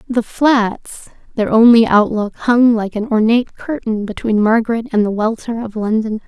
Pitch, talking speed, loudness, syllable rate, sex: 225 Hz, 160 wpm, -15 LUFS, 4.7 syllables/s, female